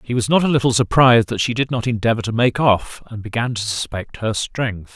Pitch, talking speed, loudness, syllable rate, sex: 115 Hz, 240 wpm, -18 LUFS, 5.6 syllables/s, male